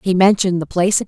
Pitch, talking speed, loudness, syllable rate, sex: 185 Hz, 225 wpm, -16 LUFS, 6.9 syllables/s, female